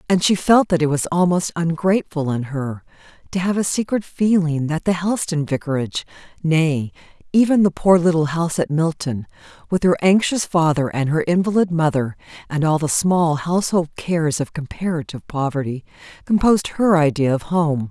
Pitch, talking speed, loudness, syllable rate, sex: 165 Hz, 160 wpm, -19 LUFS, 5.3 syllables/s, female